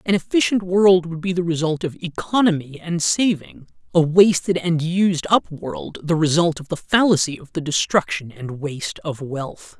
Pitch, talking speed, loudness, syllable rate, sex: 165 Hz, 180 wpm, -20 LUFS, 4.6 syllables/s, male